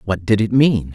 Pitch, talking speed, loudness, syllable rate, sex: 105 Hz, 255 wpm, -16 LUFS, 4.8 syllables/s, male